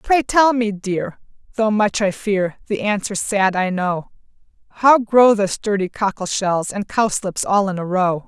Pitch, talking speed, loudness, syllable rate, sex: 205 Hz, 180 wpm, -18 LUFS, 4.2 syllables/s, female